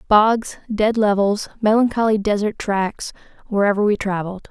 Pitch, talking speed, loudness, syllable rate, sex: 210 Hz, 120 wpm, -19 LUFS, 4.8 syllables/s, female